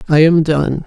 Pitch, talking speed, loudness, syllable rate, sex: 155 Hz, 205 wpm, -13 LUFS, 4.4 syllables/s, female